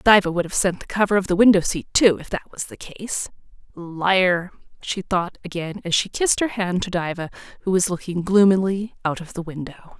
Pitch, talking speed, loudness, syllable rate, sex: 185 Hz, 210 wpm, -21 LUFS, 5.4 syllables/s, female